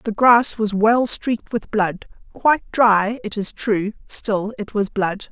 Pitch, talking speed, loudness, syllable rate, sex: 215 Hz, 180 wpm, -19 LUFS, 3.8 syllables/s, female